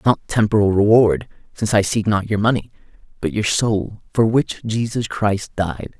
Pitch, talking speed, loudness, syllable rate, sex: 105 Hz, 170 wpm, -19 LUFS, 4.7 syllables/s, male